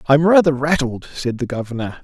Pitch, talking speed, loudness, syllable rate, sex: 135 Hz, 205 wpm, -18 LUFS, 6.1 syllables/s, male